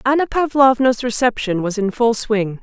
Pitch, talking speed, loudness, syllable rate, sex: 235 Hz, 160 wpm, -17 LUFS, 4.8 syllables/s, female